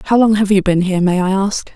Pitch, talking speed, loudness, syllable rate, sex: 195 Hz, 310 wpm, -14 LUFS, 6.5 syllables/s, female